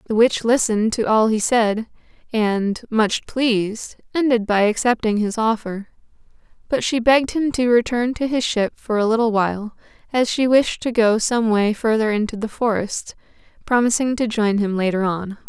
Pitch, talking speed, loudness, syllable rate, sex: 225 Hz, 175 wpm, -19 LUFS, 4.8 syllables/s, female